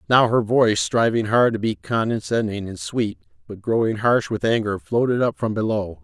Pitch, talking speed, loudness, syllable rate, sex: 110 Hz, 190 wpm, -21 LUFS, 5.1 syllables/s, male